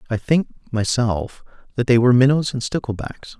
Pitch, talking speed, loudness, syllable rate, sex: 120 Hz, 160 wpm, -19 LUFS, 5.3 syllables/s, male